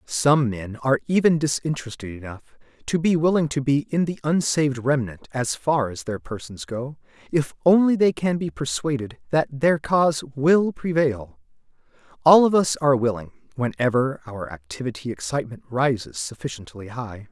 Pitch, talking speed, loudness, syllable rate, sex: 135 Hz, 150 wpm, -22 LUFS, 5.0 syllables/s, male